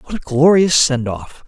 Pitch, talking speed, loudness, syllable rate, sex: 145 Hz, 205 wpm, -14 LUFS, 4.2 syllables/s, male